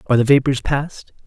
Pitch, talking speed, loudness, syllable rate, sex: 130 Hz, 190 wpm, -17 LUFS, 6.7 syllables/s, male